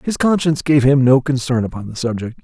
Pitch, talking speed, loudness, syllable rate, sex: 135 Hz, 220 wpm, -16 LUFS, 6.0 syllables/s, male